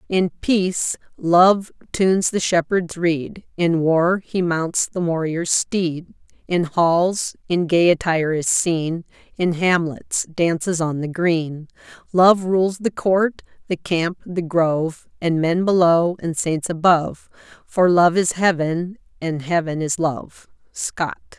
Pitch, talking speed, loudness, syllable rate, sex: 170 Hz, 140 wpm, -19 LUFS, 3.6 syllables/s, female